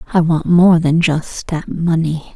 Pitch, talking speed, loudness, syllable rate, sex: 165 Hz, 180 wpm, -15 LUFS, 3.8 syllables/s, female